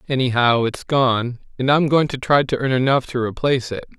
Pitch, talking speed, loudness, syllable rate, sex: 130 Hz, 210 wpm, -19 LUFS, 5.4 syllables/s, male